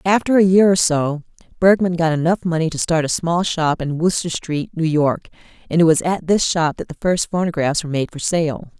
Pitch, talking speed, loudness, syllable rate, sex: 165 Hz, 225 wpm, -18 LUFS, 5.3 syllables/s, female